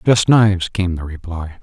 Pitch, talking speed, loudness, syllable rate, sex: 90 Hz, 185 wpm, -16 LUFS, 4.9 syllables/s, male